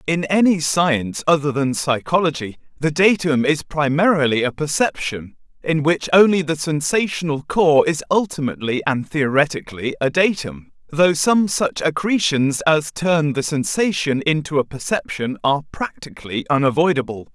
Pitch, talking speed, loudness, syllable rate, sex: 155 Hz, 130 wpm, -18 LUFS, 4.9 syllables/s, male